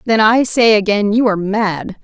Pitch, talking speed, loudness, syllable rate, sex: 215 Hz, 205 wpm, -13 LUFS, 4.7 syllables/s, female